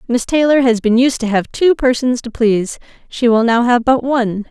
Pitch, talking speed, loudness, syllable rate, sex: 240 Hz, 225 wpm, -14 LUFS, 5.2 syllables/s, female